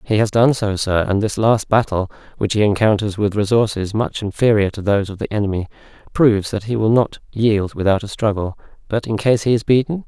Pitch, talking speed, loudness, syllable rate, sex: 105 Hz, 215 wpm, -18 LUFS, 5.7 syllables/s, male